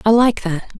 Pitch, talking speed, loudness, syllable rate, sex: 210 Hz, 225 wpm, -17 LUFS, 4.8 syllables/s, female